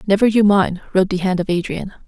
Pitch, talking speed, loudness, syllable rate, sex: 190 Hz, 230 wpm, -17 LUFS, 6.5 syllables/s, female